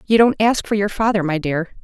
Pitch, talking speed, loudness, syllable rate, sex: 200 Hz, 260 wpm, -18 LUFS, 5.7 syllables/s, female